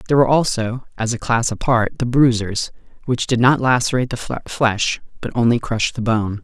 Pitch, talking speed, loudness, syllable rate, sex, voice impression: 120 Hz, 185 wpm, -18 LUFS, 5.6 syllables/s, male, masculine, adult-like, tensed, slightly bright, fluent, slightly intellectual, sincere, slightly calm, friendly, unique, slightly kind, slightly modest